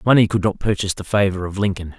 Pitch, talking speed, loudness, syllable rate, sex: 100 Hz, 240 wpm, -19 LUFS, 7.0 syllables/s, male